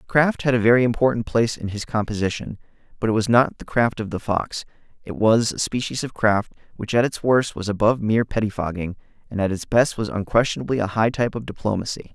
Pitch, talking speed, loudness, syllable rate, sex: 110 Hz, 210 wpm, -21 LUFS, 6.1 syllables/s, male